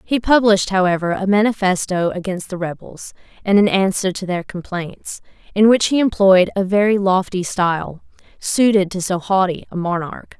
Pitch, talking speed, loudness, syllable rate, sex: 190 Hz, 160 wpm, -17 LUFS, 5.0 syllables/s, female